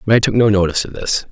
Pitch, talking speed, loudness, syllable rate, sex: 100 Hz, 320 wpm, -15 LUFS, 7.8 syllables/s, male